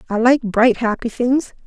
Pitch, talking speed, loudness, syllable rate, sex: 240 Hz, 180 wpm, -17 LUFS, 4.4 syllables/s, female